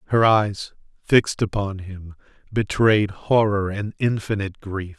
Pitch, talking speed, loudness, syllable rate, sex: 100 Hz, 120 wpm, -21 LUFS, 4.2 syllables/s, male